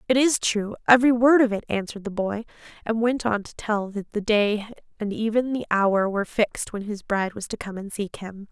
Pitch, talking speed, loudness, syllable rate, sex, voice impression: 215 Hz, 225 wpm, -23 LUFS, 5.5 syllables/s, female, very feminine, slightly adult-like, thin, slightly tensed, slightly weak, bright, soft, slightly muffled, slightly halting, slightly raspy, cute, very intellectual, refreshing, sincere, slightly calm, friendly, very reassuring, very unique, slightly elegant, sweet, lively, slightly strict, slightly intense